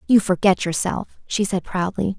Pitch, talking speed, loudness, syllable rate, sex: 190 Hz, 165 wpm, -21 LUFS, 4.6 syllables/s, female